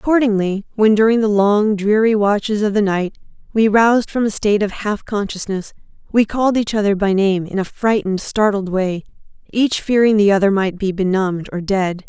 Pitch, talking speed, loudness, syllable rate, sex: 205 Hz, 190 wpm, -17 LUFS, 5.3 syllables/s, female